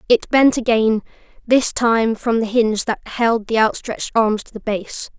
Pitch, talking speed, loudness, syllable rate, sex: 225 Hz, 185 wpm, -18 LUFS, 4.5 syllables/s, female